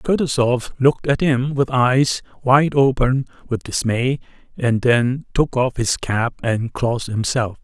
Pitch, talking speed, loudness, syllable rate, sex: 125 Hz, 150 wpm, -19 LUFS, 4.0 syllables/s, male